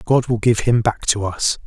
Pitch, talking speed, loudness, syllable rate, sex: 110 Hz, 250 wpm, -18 LUFS, 4.8 syllables/s, male